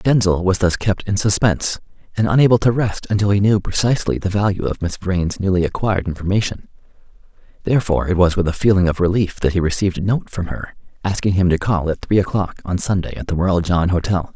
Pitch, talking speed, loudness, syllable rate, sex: 95 Hz, 215 wpm, -18 LUFS, 6.2 syllables/s, male